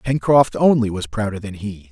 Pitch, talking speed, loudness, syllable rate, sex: 110 Hz, 190 wpm, -18 LUFS, 5.0 syllables/s, male